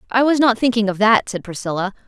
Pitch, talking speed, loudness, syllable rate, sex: 220 Hz, 230 wpm, -17 LUFS, 6.3 syllables/s, female